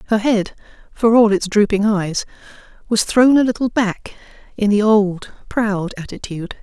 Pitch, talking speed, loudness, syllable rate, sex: 210 Hz, 155 wpm, -17 LUFS, 4.6 syllables/s, female